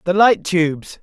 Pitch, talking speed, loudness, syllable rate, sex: 180 Hz, 175 wpm, -16 LUFS, 4.5 syllables/s, male